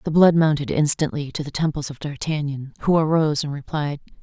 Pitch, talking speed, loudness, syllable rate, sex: 150 Hz, 185 wpm, -21 LUFS, 5.8 syllables/s, female